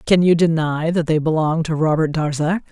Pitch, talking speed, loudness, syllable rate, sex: 160 Hz, 200 wpm, -18 LUFS, 5.2 syllables/s, female